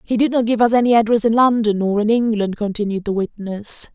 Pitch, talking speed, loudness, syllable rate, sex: 220 Hz, 230 wpm, -17 LUFS, 5.7 syllables/s, female